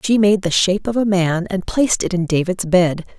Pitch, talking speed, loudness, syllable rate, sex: 190 Hz, 245 wpm, -17 LUFS, 5.4 syllables/s, female